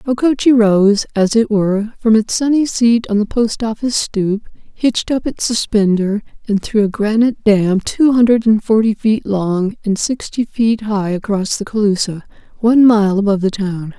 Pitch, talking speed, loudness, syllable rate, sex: 215 Hz, 175 wpm, -15 LUFS, 4.9 syllables/s, female